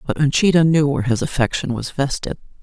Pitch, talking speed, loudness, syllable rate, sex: 145 Hz, 185 wpm, -18 LUFS, 6.2 syllables/s, female